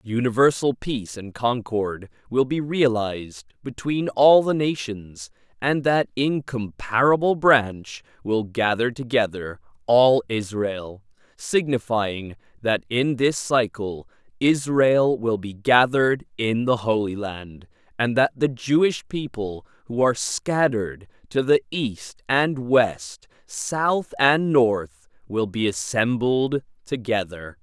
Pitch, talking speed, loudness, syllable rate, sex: 120 Hz, 115 wpm, -22 LUFS, 3.6 syllables/s, male